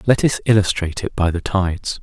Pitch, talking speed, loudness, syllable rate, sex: 100 Hz, 205 wpm, -19 LUFS, 6.0 syllables/s, male